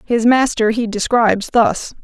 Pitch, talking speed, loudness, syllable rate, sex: 230 Hz, 150 wpm, -15 LUFS, 4.3 syllables/s, female